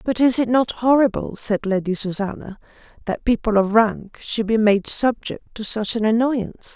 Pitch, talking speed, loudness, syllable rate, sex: 220 Hz, 180 wpm, -20 LUFS, 4.7 syllables/s, female